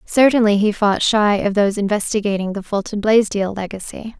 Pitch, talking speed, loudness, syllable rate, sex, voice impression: 205 Hz, 155 wpm, -17 LUFS, 5.4 syllables/s, female, intellectual, calm, slightly friendly, elegant, slightly lively, modest